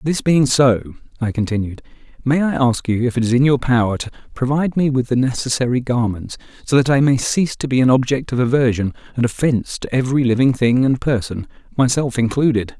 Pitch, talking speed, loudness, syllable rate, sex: 125 Hz, 200 wpm, -17 LUFS, 5.9 syllables/s, male